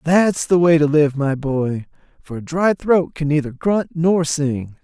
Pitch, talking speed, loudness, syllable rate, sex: 155 Hz, 200 wpm, -18 LUFS, 3.9 syllables/s, male